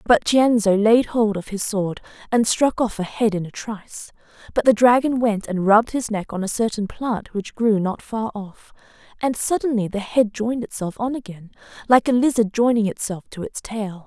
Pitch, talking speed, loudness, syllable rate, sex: 220 Hz, 205 wpm, -20 LUFS, 5.0 syllables/s, female